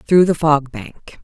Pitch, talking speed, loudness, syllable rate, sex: 150 Hz, 195 wpm, -15 LUFS, 3.7 syllables/s, female